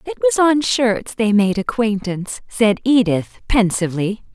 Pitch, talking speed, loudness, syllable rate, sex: 225 Hz, 140 wpm, -17 LUFS, 4.3 syllables/s, female